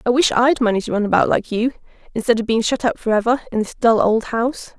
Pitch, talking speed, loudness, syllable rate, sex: 240 Hz, 265 wpm, -18 LUFS, 6.2 syllables/s, female